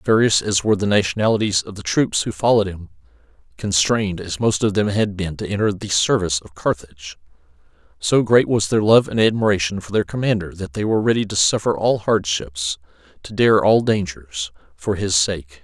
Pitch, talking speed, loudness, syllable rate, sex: 100 Hz, 190 wpm, -19 LUFS, 5.5 syllables/s, male